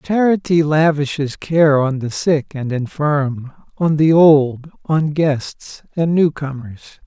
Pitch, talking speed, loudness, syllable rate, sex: 150 Hz, 135 wpm, -16 LUFS, 3.5 syllables/s, male